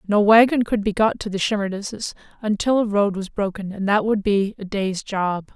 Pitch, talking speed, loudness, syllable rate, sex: 205 Hz, 215 wpm, -21 LUFS, 4.7 syllables/s, female